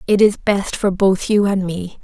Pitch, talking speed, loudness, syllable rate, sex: 195 Hz, 235 wpm, -17 LUFS, 4.3 syllables/s, female